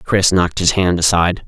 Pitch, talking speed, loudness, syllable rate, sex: 90 Hz, 205 wpm, -14 LUFS, 5.8 syllables/s, male